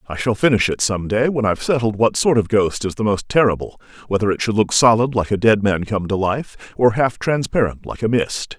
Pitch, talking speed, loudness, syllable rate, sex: 110 Hz, 240 wpm, -18 LUFS, 5.5 syllables/s, male